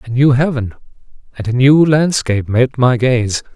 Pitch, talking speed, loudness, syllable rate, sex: 130 Hz, 170 wpm, -13 LUFS, 4.8 syllables/s, male